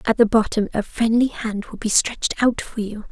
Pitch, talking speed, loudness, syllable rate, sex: 220 Hz, 230 wpm, -20 LUFS, 5.3 syllables/s, female